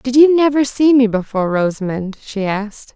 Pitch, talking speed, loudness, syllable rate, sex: 235 Hz, 185 wpm, -15 LUFS, 5.3 syllables/s, female